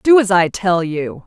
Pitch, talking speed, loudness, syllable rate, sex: 190 Hz, 235 wpm, -15 LUFS, 4.1 syllables/s, female